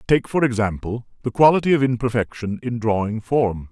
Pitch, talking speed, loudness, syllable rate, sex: 120 Hz, 160 wpm, -20 LUFS, 5.4 syllables/s, male